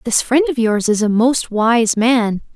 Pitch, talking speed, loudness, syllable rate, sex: 230 Hz, 210 wpm, -15 LUFS, 3.9 syllables/s, female